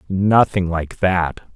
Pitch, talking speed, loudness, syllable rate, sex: 90 Hz, 115 wpm, -18 LUFS, 3.0 syllables/s, male